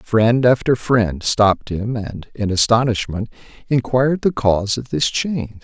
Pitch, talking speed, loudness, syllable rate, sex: 115 Hz, 150 wpm, -18 LUFS, 4.5 syllables/s, male